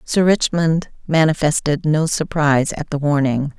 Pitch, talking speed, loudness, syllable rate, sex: 155 Hz, 135 wpm, -18 LUFS, 4.5 syllables/s, female